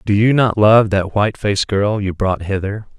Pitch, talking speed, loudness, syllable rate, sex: 105 Hz, 220 wpm, -16 LUFS, 5.0 syllables/s, male